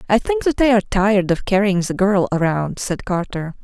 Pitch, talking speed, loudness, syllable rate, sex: 200 Hz, 200 wpm, -18 LUFS, 5.0 syllables/s, female